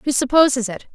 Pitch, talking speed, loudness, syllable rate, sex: 255 Hz, 190 wpm, -17 LUFS, 6.3 syllables/s, female